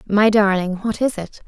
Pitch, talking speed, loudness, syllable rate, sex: 205 Hz, 205 wpm, -18 LUFS, 4.7 syllables/s, female